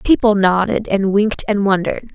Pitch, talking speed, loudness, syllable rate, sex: 205 Hz, 170 wpm, -16 LUFS, 5.5 syllables/s, female